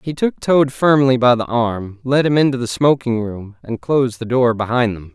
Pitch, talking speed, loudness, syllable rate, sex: 125 Hz, 220 wpm, -16 LUFS, 4.8 syllables/s, male